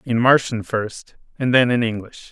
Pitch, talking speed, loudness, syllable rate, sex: 120 Hz, 180 wpm, -19 LUFS, 4.5 syllables/s, male